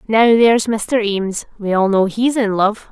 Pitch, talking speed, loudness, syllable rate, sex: 210 Hz, 185 wpm, -16 LUFS, 4.5 syllables/s, female